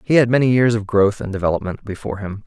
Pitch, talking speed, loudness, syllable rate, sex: 110 Hz, 245 wpm, -18 LUFS, 6.8 syllables/s, male